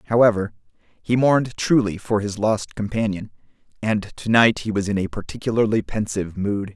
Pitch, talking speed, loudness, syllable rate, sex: 110 Hz, 160 wpm, -21 LUFS, 5.3 syllables/s, male